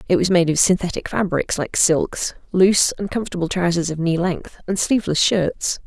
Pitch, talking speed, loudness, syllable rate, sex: 175 Hz, 185 wpm, -19 LUFS, 5.2 syllables/s, female